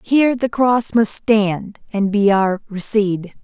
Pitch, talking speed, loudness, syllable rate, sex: 210 Hz, 155 wpm, -17 LUFS, 3.5 syllables/s, female